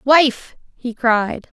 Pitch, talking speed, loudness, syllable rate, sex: 245 Hz, 115 wpm, -17 LUFS, 2.3 syllables/s, female